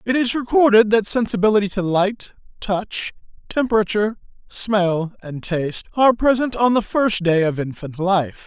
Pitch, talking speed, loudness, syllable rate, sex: 205 Hz, 150 wpm, -19 LUFS, 4.8 syllables/s, male